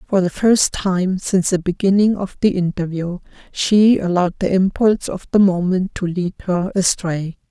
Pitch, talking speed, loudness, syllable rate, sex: 185 Hz, 170 wpm, -18 LUFS, 4.9 syllables/s, female